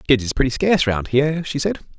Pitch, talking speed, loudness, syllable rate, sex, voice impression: 130 Hz, 240 wpm, -19 LUFS, 6.2 syllables/s, male, very masculine, very adult-like, slightly thick, fluent, slightly cool, sincere, reassuring